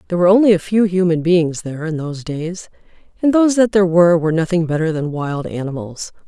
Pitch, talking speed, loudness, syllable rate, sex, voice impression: 175 Hz, 210 wpm, -16 LUFS, 6.6 syllables/s, female, feminine, very adult-like, slightly fluent, slightly intellectual, slightly calm, elegant